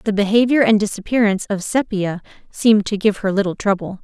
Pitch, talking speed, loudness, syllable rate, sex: 205 Hz, 180 wpm, -17 LUFS, 6.0 syllables/s, female